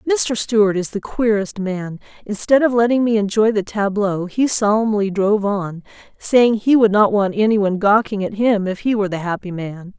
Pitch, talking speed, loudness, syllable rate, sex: 210 Hz, 200 wpm, -17 LUFS, 5.1 syllables/s, female